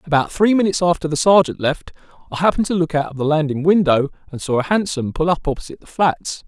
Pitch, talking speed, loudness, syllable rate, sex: 160 Hz, 230 wpm, -18 LUFS, 6.6 syllables/s, male